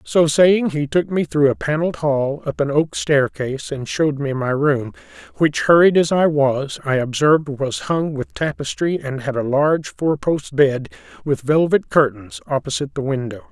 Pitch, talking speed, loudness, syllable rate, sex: 145 Hz, 180 wpm, -19 LUFS, 4.8 syllables/s, male